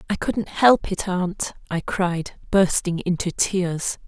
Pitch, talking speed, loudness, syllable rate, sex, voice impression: 180 Hz, 145 wpm, -22 LUFS, 3.4 syllables/s, female, very feminine, slightly gender-neutral, slightly young, slightly adult-like, thin, tensed, slightly weak, slightly bright, slightly soft, clear, fluent, slightly cute, cool, very intellectual, refreshing, very sincere, calm, very friendly, very reassuring, very elegant, slightly wild, sweet, lively, slightly strict, slightly intense